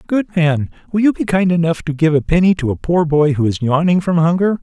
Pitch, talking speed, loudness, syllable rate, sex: 165 Hz, 260 wpm, -15 LUFS, 5.6 syllables/s, male